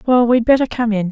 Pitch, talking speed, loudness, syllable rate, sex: 235 Hz, 270 wpm, -15 LUFS, 6.2 syllables/s, female